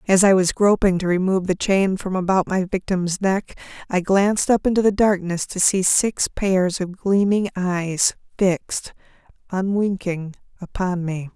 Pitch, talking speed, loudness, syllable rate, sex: 190 Hz, 160 wpm, -20 LUFS, 4.4 syllables/s, female